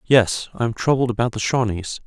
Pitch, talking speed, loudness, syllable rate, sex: 120 Hz, 205 wpm, -21 LUFS, 5.4 syllables/s, male